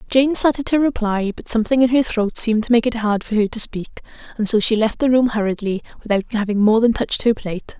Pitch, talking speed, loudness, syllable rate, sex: 225 Hz, 245 wpm, -18 LUFS, 6.4 syllables/s, female